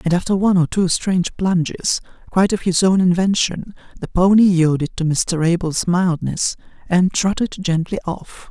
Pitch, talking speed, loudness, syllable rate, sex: 180 Hz, 160 wpm, -18 LUFS, 4.9 syllables/s, male